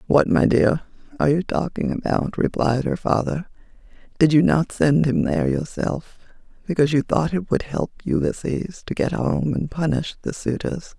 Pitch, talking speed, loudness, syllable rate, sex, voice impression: 155 Hz, 170 wpm, -21 LUFS, 4.9 syllables/s, female, feminine, gender-neutral, very adult-like, middle-aged, slightly thick, very relaxed, very weak, dark, very hard, very muffled, halting, very raspy, cool, intellectual, sincere, slightly calm, slightly mature, slightly friendly, slightly reassuring, very unique, very wild, very strict, very modest